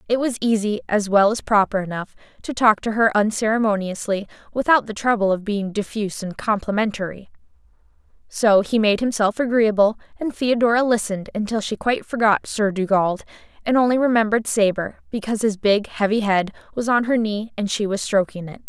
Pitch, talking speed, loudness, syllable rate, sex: 215 Hz, 170 wpm, -20 LUFS, 5.7 syllables/s, female